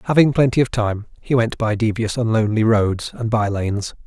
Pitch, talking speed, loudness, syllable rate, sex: 115 Hz, 205 wpm, -19 LUFS, 5.6 syllables/s, male